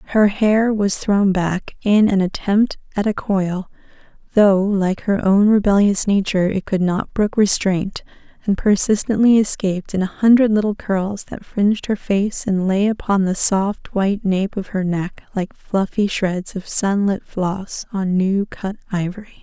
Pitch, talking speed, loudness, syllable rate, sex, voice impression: 200 Hz, 170 wpm, -18 LUFS, 4.2 syllables/s, female, very feminine, young, very thin, very relaxed, very weak, dark, very soft, slightly muffled, fluent, slightly raspy, very cute, very intellectual, slightly refreshing, very sincere, very calm, very friendly, very reassuring, very unique, very elegant, very sweet, very kind, very modest, slightly light